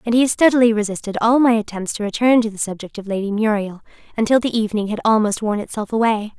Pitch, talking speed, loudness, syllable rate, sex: 220 Hz, 215 wpm, -18 LUFS, 6.4 syllables/s, female